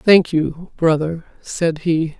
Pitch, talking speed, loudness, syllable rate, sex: 165 Hz, 135 wpm, -18 LUFS, 3.1 syllables/s, female